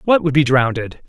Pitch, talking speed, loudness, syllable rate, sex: 145 Hz, 220 wpm, -16 LUFS, 5.3 syllables/s, male